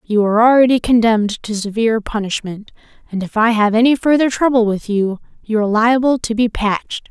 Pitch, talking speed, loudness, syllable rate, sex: 225 Hz, 185 wpm, -15 LUFS, 5.8 syllables/s, female